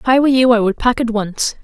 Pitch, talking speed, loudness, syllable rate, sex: 235 Hz, 330 wpm, -15 LUFS, 6.7 syllables/s, female